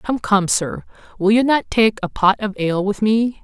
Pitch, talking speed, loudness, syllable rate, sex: 210 Hz, 225 wpm, -18 LUFS, 4.7 syllables/s, female